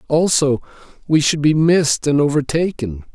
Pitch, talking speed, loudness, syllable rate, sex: 145 Hz, 135 wpm, -17 LUFS, 4.9 syllables/s, male